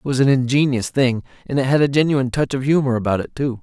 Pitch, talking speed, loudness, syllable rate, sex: 130 Hz, 265 wpm, -18 LUFS, 6.5 syllables/s, male